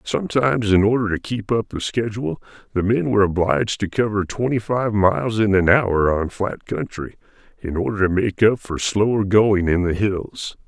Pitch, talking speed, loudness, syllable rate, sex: 105 Hz, 190 wpm, -20 LUFS, 5.0 syllables/s, male